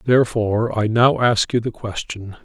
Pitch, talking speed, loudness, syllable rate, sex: 115 Hz, 170 wpm, -19 LUFS, 4.9 syllables/s, male